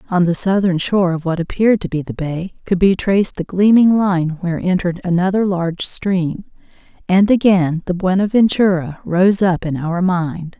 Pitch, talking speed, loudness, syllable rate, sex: 180 Hz, 175 wpm, -16 LUFS, 5.0 syllables/s, female